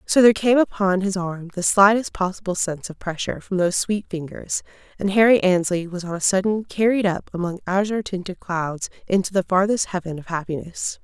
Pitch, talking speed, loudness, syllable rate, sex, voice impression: 190 Hz, 190 wpm, -21 LUFS, 5.8 syllables/s, female, feminine, very adult-like, slightly relaxed, slightly intellectual, calm